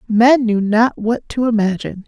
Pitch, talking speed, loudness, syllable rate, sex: 225 Hz, 175 wpm, -16 LUFS, 4.7 syllables/s, female